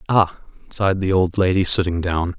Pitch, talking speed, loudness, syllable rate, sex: 90 Hz, 175 wpm, -19 LUFS, 5.2 syllables/s, male